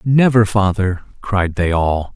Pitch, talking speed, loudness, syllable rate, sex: 100 Hz, 140 wpm, -16 LUFS, 3.8 syllables/s, male